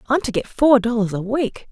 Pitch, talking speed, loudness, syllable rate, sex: 235 Hz, 245 wpm, -19 LUFS, 5.3 syllables/s, female